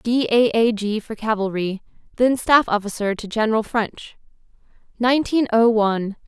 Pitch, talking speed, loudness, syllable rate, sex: 220 Hz, 145 wpm, -20 LUFS, 4.9 syllables/s, female